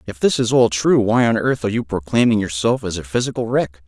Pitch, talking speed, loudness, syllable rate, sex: 110 Hz, 250 wpm, -18 LUFS, 5.9 syllables/s, male